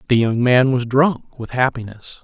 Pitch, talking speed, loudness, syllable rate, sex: 125 Hz, 190 wpm, -17 LUFS, 4.4 syllables/s, male